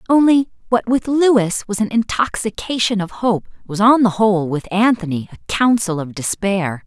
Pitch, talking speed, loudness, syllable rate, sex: 210 Hz, 165 wpm, -17 LUFS, 4.7 syllables/s, female